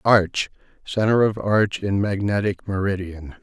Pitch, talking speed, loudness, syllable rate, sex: 100 Hz, 125 wpm, -22 LUFS, 4.1 syllables/s, male